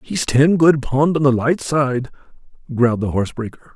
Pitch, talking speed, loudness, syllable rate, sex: 135 Hz, 190 wpm, -17 LUFS, 5.3 syllables/s, male